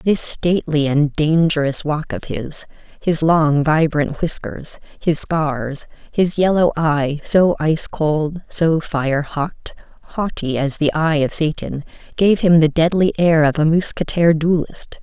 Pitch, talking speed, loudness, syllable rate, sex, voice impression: 155 Hz, 150 wpm, -17 LUFS, 3.9 syllables/s, female, very feminine, slightly middle-aged, slightly thin, tensed, slightly weak, bright, soft, slightly clear, fluent, slightly raspy, cool, very intellectual, refreshing, sincere, very calm, very friendly, very reassuring, unique, very elegant, slightly wild, very sweet, lively, very kind, modest, slightly light